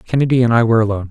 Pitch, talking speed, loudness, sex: 115 Hz, 270 wpm, -14 LUFS, male